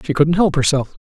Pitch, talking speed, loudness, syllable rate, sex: 150 Hz, 235 wpm, -16 LUFS, 5.8 syllables/s, male